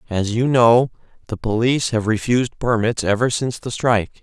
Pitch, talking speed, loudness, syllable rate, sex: 115 Hz, 170 wpm, -19 LUFS, 5.5 syllables/s, male